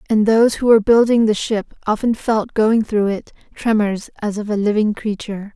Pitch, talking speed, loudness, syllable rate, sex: 215 Hz, 195 wpm, -17 LUFS, 5.3 syllables/s, female